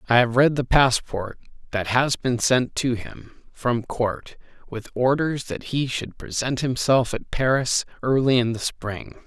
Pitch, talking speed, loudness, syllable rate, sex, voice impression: 125 Hz, 170 wpm, -22 LUFS, 4.0 syllables/s, male, very masculine, very adult-like, very middle-aged, thick, slightly tensed, slightly powerful, slightly bright, slightly hard, slightly muffled, cool, very intellectual, refreshing, sincere, very calm, slightly mature, friendly, reassuring, slightly unique, elegant, slightly wild, lively, very kind, very modest